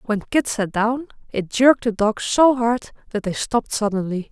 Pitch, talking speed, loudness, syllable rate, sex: 225 Hz, 195 wpm, -20 LUFS, 4.9 syllables/s, female